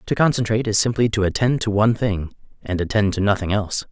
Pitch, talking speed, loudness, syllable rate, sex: 105 Hz, 215 wpm, -20 LUFS, 6.6 syllables/s, male